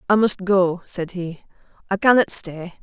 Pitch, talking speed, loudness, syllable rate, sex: 190 Hz, 170 wpm, -20 LUFS, 4.3 syllables/s, female